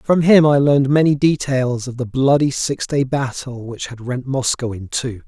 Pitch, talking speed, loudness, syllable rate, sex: 130 Hz, 205 wpm, -17 LUFS, 4.6 syllables/s, male